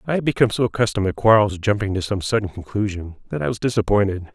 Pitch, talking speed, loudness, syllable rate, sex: 100 Hz, 220 wpm, -20 LUFS, 7.1 syllables/s, male